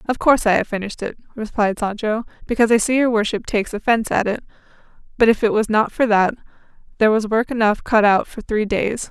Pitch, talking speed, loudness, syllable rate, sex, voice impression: 220 Hz, 220 wpm, -18 LUFS, 6.4 syllables/s, female, feminine, slightly gender-neutral, slightly young, slightly adult-like, thin, slightly tensed, slightly weak, bright, hard, clear, fluent, slightly cool, intellectual, slightly refreshing, sincere, calm, friendly, slightly reassuring, unique, elegant, slightly sweet, lively, slightly kind, slightly modest